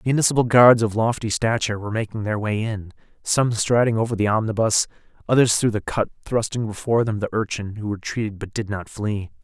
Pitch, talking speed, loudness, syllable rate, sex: 110 Hz, 190 wpm, -21 LUFS, 5.9 syllables/s, male